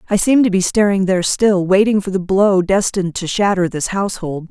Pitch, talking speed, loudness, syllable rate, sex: 190 Hz, 215 wpm, -15 LUFS, 5.6 syllables/s, female